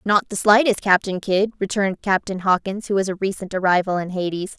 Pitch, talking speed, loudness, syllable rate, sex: 195 Hz, 195 wpm, -20 LUFS, 5.7 syllables/s, female